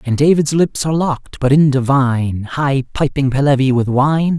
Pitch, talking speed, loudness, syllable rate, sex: 140 Hz, 180 wpm, -15 LUFS, 4.9 syllables/s, male